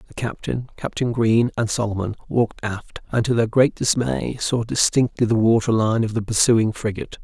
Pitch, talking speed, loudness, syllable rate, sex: 115 Hz, 180 wpm, -21 LUFS, 5.1 syllables/s, male